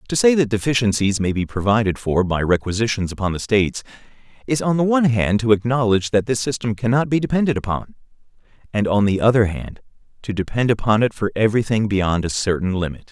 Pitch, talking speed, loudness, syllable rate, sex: 110 Hz, 195 wpm, -19 LUFS, 6.2 syllables/s, male